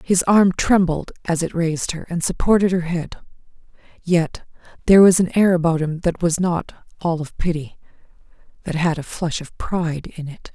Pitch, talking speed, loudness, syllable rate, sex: 170 Hz, 175 wpm, -19 LUFS, 5.1 syllables/s, female